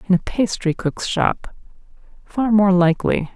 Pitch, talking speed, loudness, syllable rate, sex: 190 Hz, 145 wpm, -19 LUFS, 4.4 syllables/s, female